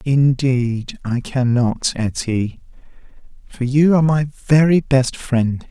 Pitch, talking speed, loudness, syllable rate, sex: 130 Hz, 115 wpm, -17 LUFS, 3.4 syllables/s, male